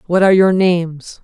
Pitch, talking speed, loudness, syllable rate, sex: 180 Hz, 195 wpm, -13 LUFS, 5.6 syllables/s, female